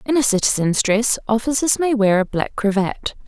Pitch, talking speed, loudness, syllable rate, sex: 225 Hz, 185 wpm, -18 LUFS, 5.0 syllables/s, female